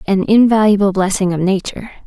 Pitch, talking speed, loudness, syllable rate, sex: 200 Hz, 145 wpm, -14 LUFS, 6.2 syllables/s, female